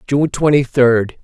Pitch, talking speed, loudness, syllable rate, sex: 135 Hz, 145 wpm, -14 LUFS, 3.7 syllables/s, male